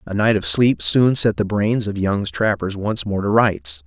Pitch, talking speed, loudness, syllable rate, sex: 100 Hz, 235 wpm, -18 LUFS, 4.3 syllables/s, male